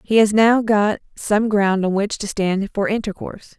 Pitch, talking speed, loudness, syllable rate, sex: 205 Hz, 200 wpm, -18 LUFS, 4.6 syllables/s, female